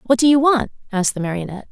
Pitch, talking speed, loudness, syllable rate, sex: 225 Hz, 245 wpm, -18 LUFS, 7.8 syllables/s, female